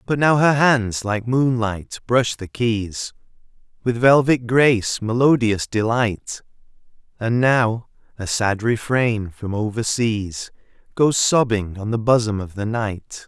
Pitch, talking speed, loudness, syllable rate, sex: 115 Hz, 130 wpm, -19 LUFS, 3.7 syllables/s, male